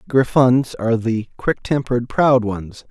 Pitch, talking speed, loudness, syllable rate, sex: 120 Hz, 145 wpm, -18 LUFS, 4.2 syllables/s, male